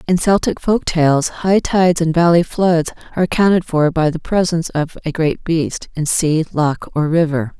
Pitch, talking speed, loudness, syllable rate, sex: 165 Hz, 190 wpm, -16 LUFS, 4.8 syllables/s, female